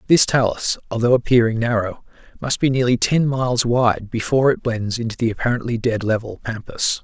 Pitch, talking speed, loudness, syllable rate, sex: 120 Hz, 170 wpm, -19 LUFS, 5.5 syllables/s, male